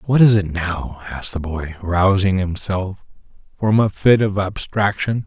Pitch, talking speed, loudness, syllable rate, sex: 95 Hz, 160 wpm, -19 LUFS, 4.3 syllables/s, male